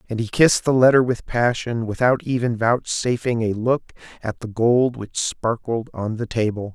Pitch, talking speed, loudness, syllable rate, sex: 115 Hz, 180 wpm, -20 LUFS, 4.7 syllables/s, male